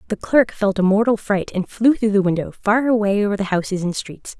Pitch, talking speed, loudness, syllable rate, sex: 205 Hz, 245 wpm, -19 LUFS, 5.7 syllables/s, female